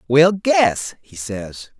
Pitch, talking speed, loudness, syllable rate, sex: 130 Hz, 135 wpm, -18 LUFS, 2.6 syllables/s, male